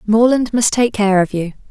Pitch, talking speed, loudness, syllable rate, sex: 215 Hz, 210 wpm, -15 LUFS, 4.9 syllables/s, female